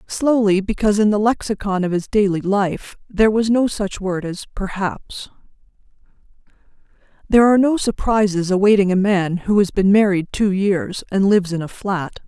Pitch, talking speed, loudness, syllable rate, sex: 200 Hz, 165 wpm, -18 LUFS, 5.1 syllables/s, female